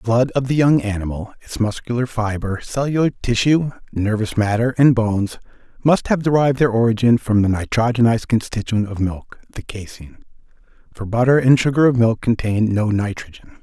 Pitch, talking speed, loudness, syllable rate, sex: 115 Hz, 160 wpm, -18 LUFS, 5.5 syllables/s, male